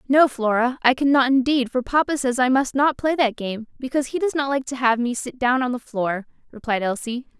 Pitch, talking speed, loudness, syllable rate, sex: 255 Hz, 235 wpm, -21 LUFS, 5.5 syllables/s, female